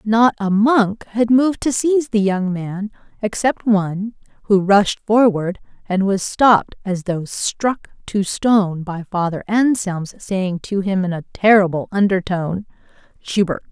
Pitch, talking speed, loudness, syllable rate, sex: 200 Hz, 150 wpm, -18 LUFS, 4.3 syllables/s, female